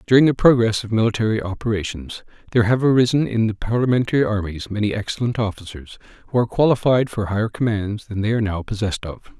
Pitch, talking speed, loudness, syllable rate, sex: 110 Hz, 180 wpm, -20 LUFS, 6.6 syllables/s, male